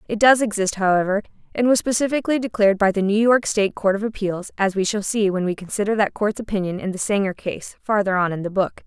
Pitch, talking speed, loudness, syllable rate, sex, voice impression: 205 Hz, 235 wpm, -20 LUFS, 6.3 syllables/s, female, feminine, slightly adult-like, slightly clear, slightly cute, slightly calm, friendly